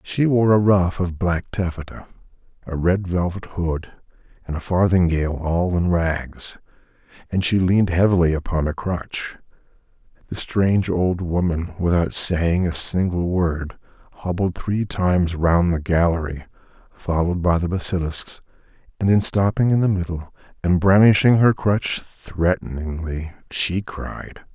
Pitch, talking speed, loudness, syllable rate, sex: 90 Hz, 135 wpm, -20 LUFS, 4.3 syllables/s, male